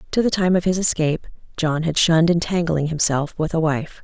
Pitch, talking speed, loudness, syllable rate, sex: 165 Hz, 225 wpm, -20 LUFS, 5.7 syllables/s, female